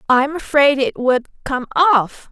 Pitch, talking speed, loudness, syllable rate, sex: 270 Hz, 155 wpm, -16 LUFS, 3.5 syllables/s, female